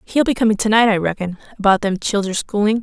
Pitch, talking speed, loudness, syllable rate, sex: 210 Hz, 235 wpm, -17 LUFS, 6.3 syllables/s, female